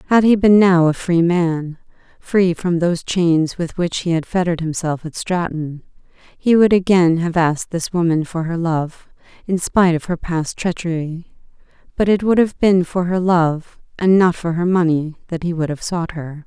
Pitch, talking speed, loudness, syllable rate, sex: 170 Hz, 190 wpm, -17 LUFS, 4.7 syllables/s, female